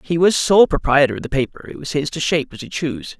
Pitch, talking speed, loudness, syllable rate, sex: 155 Hz, 280 wpm, -18 LUFS, 6.5 syllables/s, male